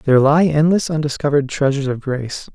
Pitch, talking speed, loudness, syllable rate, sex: 145 Hz, 165 wpm, -17 LUFS, 6.5 syllables/s, male